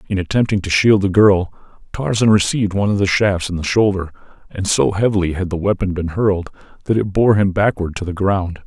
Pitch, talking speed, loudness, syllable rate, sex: 95 Hz, 215 wpm, -17 LUFS, 5.9 syllables/s, male